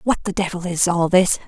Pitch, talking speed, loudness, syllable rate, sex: 180 Hz, 245 wpm, -19 LUFS, 5.7 syllables/s, female